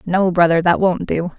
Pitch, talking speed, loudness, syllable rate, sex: 175 Hz, 215 wpm, -16 LUFS, 4.7 syllables/s, female